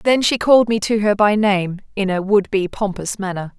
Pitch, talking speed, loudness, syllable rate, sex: 205 Hz, 235 wpm, -17 LUFS, 5.2 syllables/s, female